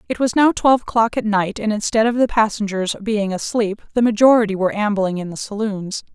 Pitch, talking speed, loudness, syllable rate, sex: 215 Hz, 205 wpm, -18 LUFS, 5.7 syllables/s, female